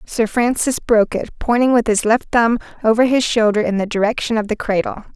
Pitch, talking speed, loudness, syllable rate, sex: 225 Hz, 210 wpm, -17 LUFS, 5.5 syllables/s, female